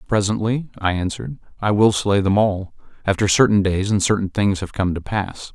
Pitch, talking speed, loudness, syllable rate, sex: 100 Hz, 185 wpm, -19 LUFS, 5.3 syllables/s, male